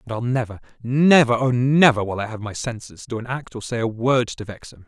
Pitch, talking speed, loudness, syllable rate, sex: 120 Hz, 235 wpm, -20 LUFS, 5.8 syllables/s, male